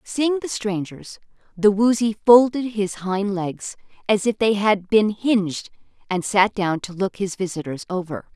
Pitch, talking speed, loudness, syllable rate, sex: 205 Hz, 165 wpm, -21 LUFS, 4.2 syllables/s, female